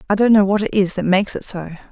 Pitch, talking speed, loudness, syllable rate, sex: 195 Hz, 315 wpm, -17 LUFS, 7.1 syllables/s, female